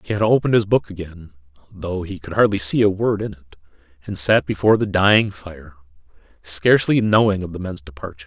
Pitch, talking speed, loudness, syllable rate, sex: 95 Hz, 195 wpm, -18 LUFS, 6.0 syllables/s, male